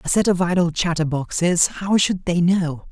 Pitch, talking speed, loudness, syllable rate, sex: 175 Hz, 185 wpm, -19 LUFS, 4.7 syllables/s, male